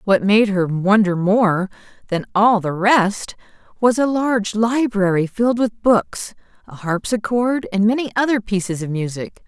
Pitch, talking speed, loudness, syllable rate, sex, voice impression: 210 Hz, 150 wpm, -18 LUFS, 4.4 syllables/s, female, very feminine, adult-like, slightly middle-aged, thin, tensed, powerful, bright, slightly soft, very clear, fluent, cool, very intellectual, very refreshing, sincere, calm, friendly, reassuring, very unique, elegant, slightly wild, sweet, very lively, strict, intense, slightly sharp, slightly light